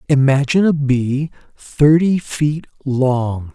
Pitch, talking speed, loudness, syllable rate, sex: 140 Hz, 100 wpm, -16 LUFS, 3.4 syllables/s, male